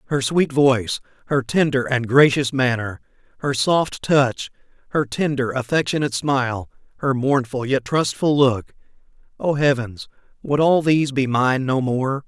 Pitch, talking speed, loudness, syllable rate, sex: 135 Hz, 135 wpm, -20 LUFS, 4.5 syllables/s, male